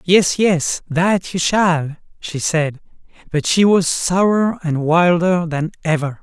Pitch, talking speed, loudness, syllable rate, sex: 170 Hz, 145 wpm, -17 LUFS, 3.5 syllables/s, male